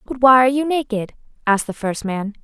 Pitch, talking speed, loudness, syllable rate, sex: 235 Hz, 220 wpm, -18 LUFS, 6.1 syllables/s, female